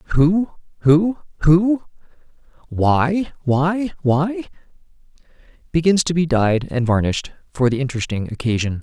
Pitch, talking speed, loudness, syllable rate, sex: 150 Hz, 110 wpm, -19 LUFS, 4.3 syllables/s, male